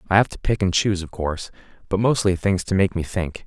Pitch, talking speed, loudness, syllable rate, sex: 95 Hz, 260 wpm, -22 LUFS, 6.2 syllables/s, male